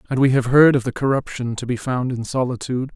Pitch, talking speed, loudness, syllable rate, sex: 125 Hz, 245 wpm, -19 LUFS, 6.2 syllables/s, male